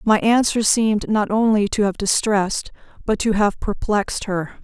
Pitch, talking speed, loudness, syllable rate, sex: 210 Hz, 170 wpm, -19 LUFS, 4.8 syllables/s, female